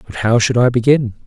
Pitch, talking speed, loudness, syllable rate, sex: 120 Hz, 235 wpm, -14 LUFS, 5.8 syllables/s, male